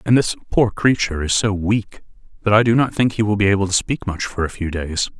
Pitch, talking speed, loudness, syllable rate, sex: 105 Hz, 265 wpm, -19 LUFS, 5.8 syllables/s, male